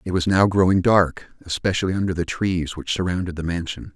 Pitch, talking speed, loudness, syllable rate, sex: 90 Hz, 195 wpm, -21 LUFS, 5.7 syllables/s, male